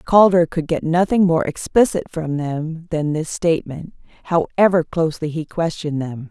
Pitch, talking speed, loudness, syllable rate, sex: 160 Hz, 150 wpm, -19 LUFS, 4.9 syllables/s, female